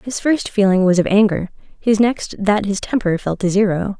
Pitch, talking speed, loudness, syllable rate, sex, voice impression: 205 Hz, 210 wpm, -17 LUFS, 4.9 syllables/s, female, very feminine, very middle-aged, very thin, slightly tensed, slightly weak, bright, soft, very clear, very fluent, slightly raspy, cute, very intellectual, very refreshing, sincere, calm, very friendly, very reassuring, very unique, very elegant, very sweet, lively, very kind, slightly intense, slightly sharp, slightly modest, very light